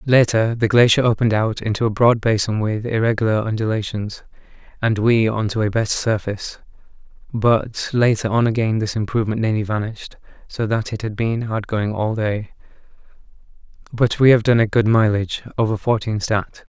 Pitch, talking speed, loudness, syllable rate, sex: 110 Hz, 165 wpm, -19 LUFS, 5.3 syllables/s, male